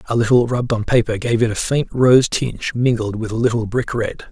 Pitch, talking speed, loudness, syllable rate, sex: 115 Hz, 235 wpm, -18 LUFS, 5.6 syllables/s, male